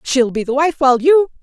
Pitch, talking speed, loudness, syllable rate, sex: 280 Hz, 255 wpm, -14 LUFS, 5.8 syllables/s, female